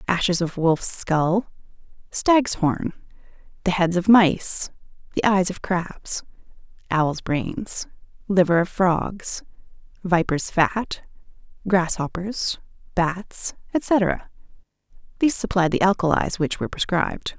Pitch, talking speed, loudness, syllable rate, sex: 185 Hz, 105 wpm, -22 LUFS, 3.6 syllables/s, female